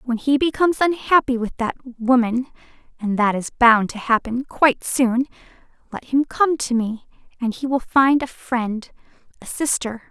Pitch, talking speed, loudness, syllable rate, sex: 250 Hz, 165 wpm, -20 LUFS, 4.5 syllables/s, female